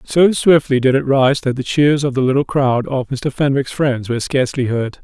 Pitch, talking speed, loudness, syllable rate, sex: 135 Hz, 225 wpm, -16 LUFS, 5.1 syllables/s, male